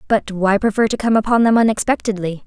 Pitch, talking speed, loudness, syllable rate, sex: 210 Hz, 195 wpm, -16 LUFS, 6.1 syllables/s, female